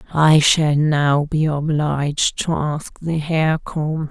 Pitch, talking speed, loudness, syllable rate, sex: 150 Hz, 145 wpm, -18 LUFS, 3.1 syllables/s, female